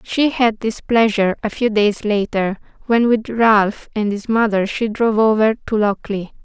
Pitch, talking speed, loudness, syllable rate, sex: 215 Hz, 175 wpm, -17 LUFS, 4.4 syllables/s, female